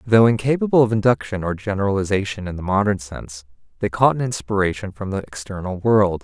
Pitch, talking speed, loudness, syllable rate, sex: 100 Hz, 175 wpm, -20 LUFS, 6.0 syllables/s, male